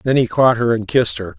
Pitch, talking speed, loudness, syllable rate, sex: 120 Hz, 305 wpm, -16 LUFS, 6.3 syllables/s, male